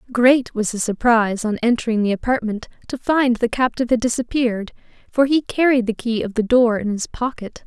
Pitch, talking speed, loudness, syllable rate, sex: 235 Hz, 195 wpm, -19 LUFS, 5.5 syllables/s, female